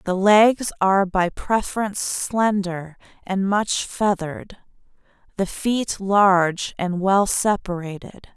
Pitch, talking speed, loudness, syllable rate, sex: 195 Hz, 110 wpm, -20 LUFS, 3.7 syllables/s, female